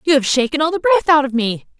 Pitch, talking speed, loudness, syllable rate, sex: 290 Hz, 300 wpm, -16 LUFS, 6.4 syllables/s, female